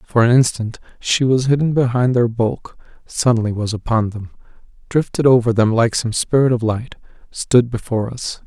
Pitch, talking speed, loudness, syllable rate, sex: 120 Hz, 170 wpm, -17 LUFS, 5.1 syllables/s, male